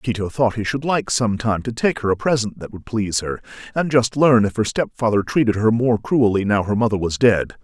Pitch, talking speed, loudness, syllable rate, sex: 110 Hz, 250 wpm, -19 LUFS, 5.5 syllables/s, male